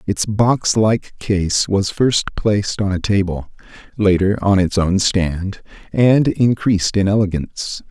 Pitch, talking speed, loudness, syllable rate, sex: 100 Hz, 145 wpm, -17 LUFS, 3.9 syllables/s, male